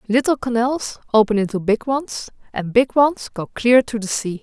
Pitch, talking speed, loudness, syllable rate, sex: 235 Hz, 190 wpm, -19 LUFS, 4.6 syllables/s, female